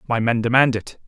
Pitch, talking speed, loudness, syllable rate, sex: 120 Hz, 225 wpm, -19 LUFS, 5.8 syllables/s, male